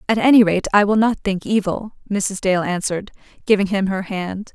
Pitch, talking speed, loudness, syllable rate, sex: 200 Hz, 200 wpm, -18 LUFS, 5.2 syllables/s, female